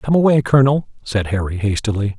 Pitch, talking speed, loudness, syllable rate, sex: 120 Hz, 165 wpm, -17 LUFS, 6.1 syllables/s, male